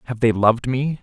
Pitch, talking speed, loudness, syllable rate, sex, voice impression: 120 Hz, 235 wpm, -19 LUFS, 6.2 syllables/s, male, masculine, adult-like, sincere, friendly, slightly kind